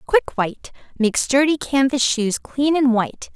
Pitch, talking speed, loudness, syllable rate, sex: 260 Hz, 160 wpm, -19 LUFS, 5.0 syllables/s, female